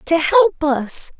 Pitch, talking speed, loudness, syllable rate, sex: 310 Hz, 150 wpm, -16 LUFS, 2.9 syllables/s, female